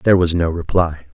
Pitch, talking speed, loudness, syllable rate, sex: 85 Hz, 205 wpm, -18 LUFS, 5.7 syllables/s, male